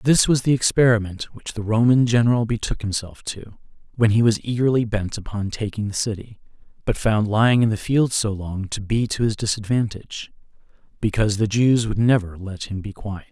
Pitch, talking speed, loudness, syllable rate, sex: 110 Hz, 190 wpm, -21 LUFS, 5.5 syllables/s, male